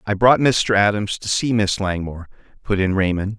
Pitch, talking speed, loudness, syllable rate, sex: 100 Hz, 195 wpm, -18 LUFS, 5.2 syllables/s, male